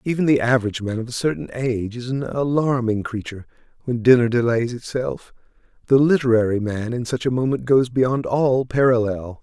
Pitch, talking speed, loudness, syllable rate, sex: 125 Hz, 170 wpm, -20 LUFS, 5.5 syllables/s, male